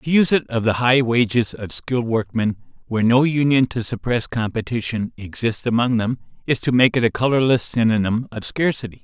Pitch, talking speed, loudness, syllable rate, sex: 120 Hz, 185 wpm, -20 LUFS, 5.5 syllables/s, male